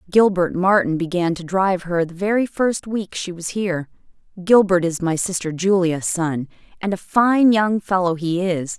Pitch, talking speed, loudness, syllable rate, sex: 185 Hz, 180 wpm, -19 LUFS, 4.7 syllables/s, female